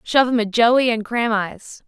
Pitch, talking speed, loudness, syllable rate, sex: 230 Hz, 190 wpm, -18 LUFS, 5.8 syllables/s, female